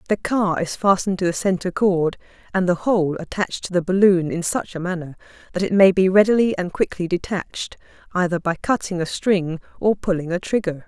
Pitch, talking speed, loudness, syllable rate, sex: 185 Hz, 200 wpm, -20 LUFS, 5.7 syllables/s, female